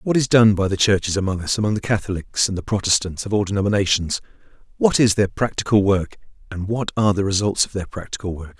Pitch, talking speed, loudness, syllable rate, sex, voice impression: 100 Hz, 210 wpm, -20 LUFS, 6.3 syllables/s, male, masculine, adult-like, slightly thick, fluent, cool, slightly sincere